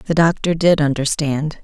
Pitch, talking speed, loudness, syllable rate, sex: 155 Hz, 145 wpm, -17 LUFS, 4.5 syllables/s, female